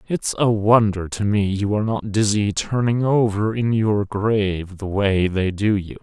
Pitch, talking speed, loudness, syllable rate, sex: 105 Hz, 190 wpm, -20 LUFS, 4.3 syllables/s, male